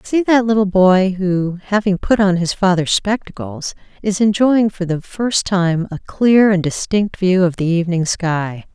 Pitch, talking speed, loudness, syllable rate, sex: 190 Hz, 180 wpm, -16 LUFS, 4.3 syllables/s, female